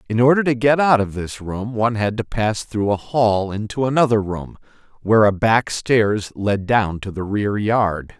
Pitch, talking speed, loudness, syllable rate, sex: 110 Hz, 205 wpm, -19 LUFS, 4.5 syllables/s, male